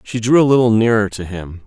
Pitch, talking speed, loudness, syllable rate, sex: 110 Hz, 255 wpm, -14 LUFS, 5.8 syllables/s, male